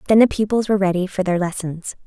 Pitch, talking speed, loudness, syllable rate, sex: 195 Hz, 235 wpm, -19 LUFS, 6.6 syllables/s, female